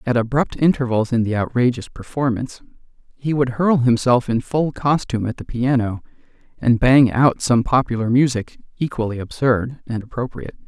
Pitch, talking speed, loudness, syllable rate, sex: 125 Hz, 150 wpm, -19 LUFS, 5.2 syllables/s, male